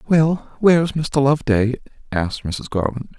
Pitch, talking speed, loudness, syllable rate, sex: 140 Hz, 130 wpm, -19 LUFS, 4.7 syllables/s, male